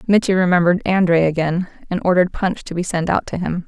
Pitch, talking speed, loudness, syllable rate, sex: 175 Hz, 210 wpm, -18 LUFS, 6.3 syllables/s, female